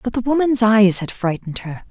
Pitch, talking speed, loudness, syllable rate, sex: 215 Hz, 220 wpm, -16 LUFS, 5.4 syllables/s, female